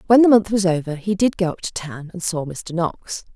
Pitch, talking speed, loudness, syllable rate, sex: 185 Hz, 270 wpm, -20 LUFS, 5.2 syllables/s, female